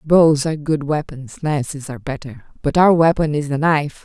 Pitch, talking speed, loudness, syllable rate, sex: 150 Hz, 195 wpm, -18 LUFS, 5.3 syllables/s, female